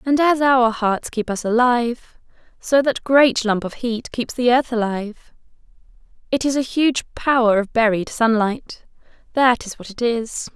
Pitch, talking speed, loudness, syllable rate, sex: 240 Hz, 165 wpm, -19 LUFS, 4.4 syllables/s, female